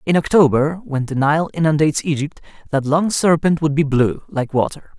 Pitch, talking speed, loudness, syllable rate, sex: 150 Hz, 180 wpm, -17 LUFS, 5.3 syllables/s, male